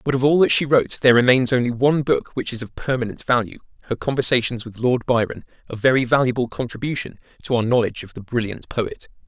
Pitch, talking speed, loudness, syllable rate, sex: 125 Hz, 200 wpm, -20 LUFS, 6.4 syllables/s, male